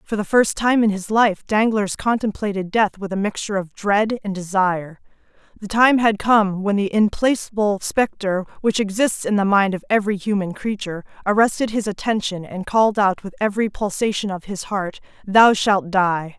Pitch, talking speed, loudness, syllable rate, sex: 205 Hz, 180 wpm, -19 LUFS, 5.1 syllables/s, female